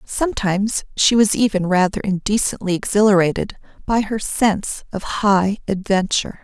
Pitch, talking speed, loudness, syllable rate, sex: 200 Hz, 120 wpm, -18 LUFS, 5.0 syllables/s, female